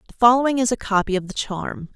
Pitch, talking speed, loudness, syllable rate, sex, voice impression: 220 Hz, 245 wpm, -20 LUFS, 6.3 syllables/s, female, very feminine, adult-like, slightly middle-aged, thin, tensed, powerful, bright, slightly hard, clear, fluent, slightly raspy, slightly cute, cool, slightly intellectual, refreshing, slightly sincere, calm, slightly friendly, reassuring, very unique, elegant, slightly wild, lively, strict, slightly intense, sharp, slightly light